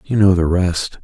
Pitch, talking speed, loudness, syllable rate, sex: 90 Hz, 230 wpm, -16 LUFS, 4.4 syllables/s, male